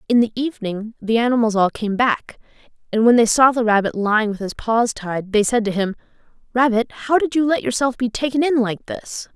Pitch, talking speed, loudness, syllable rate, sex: 230 Hz, 220 wpm, -19 LUFS, 5.6 syllables/s, female